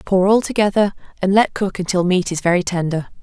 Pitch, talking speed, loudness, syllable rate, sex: 190 Hz, 205 wpm, -18 LUFS, 5.7 syllables/s, female